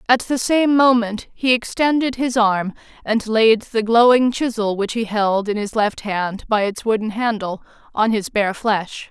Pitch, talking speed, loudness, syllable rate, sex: 225 Hz, 185 wpm, -18 LUFS, 4.2 syllables/s, female